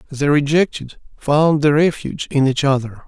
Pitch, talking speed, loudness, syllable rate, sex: 145 Hz, 155 wpm, -17 LUFS, 4.9 syllables/s, male